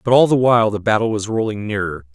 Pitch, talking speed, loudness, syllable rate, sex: 110 Hz, 250 wpm, -17 LUFS, 6.6 syllables/s, male